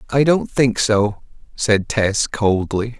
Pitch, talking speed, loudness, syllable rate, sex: 115 Hz, 140 wpm, -18 LUFS, 3.2 syllables/s, male